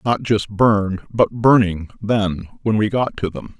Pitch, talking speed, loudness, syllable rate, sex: 105 Hz, 185 wpm, -18 LUFS, 4.3 syllables/s, male